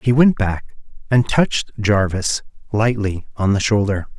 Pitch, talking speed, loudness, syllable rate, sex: 110 Hz, 145 wpm, -18 LUFS, 4.2 syllables/s, male